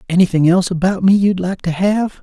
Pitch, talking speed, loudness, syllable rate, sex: 185 Hz, 215 wpm, -15 LUFS, 5.7 syllables/s, male